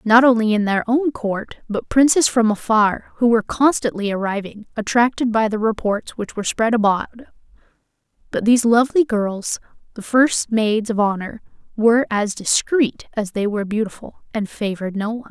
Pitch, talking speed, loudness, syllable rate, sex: 220 Hz, 165 wpm, -19 LUFS, 5.2 syllables/s, female